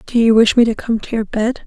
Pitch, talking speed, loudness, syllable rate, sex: 225 Hz, 325 wpm, -15 LUFS, 6.0 syllables/s, female